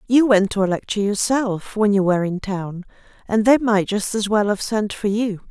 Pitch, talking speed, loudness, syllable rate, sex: 205 Hz, 230 wpm, -19 LUFS, 5.1 syllables/s, female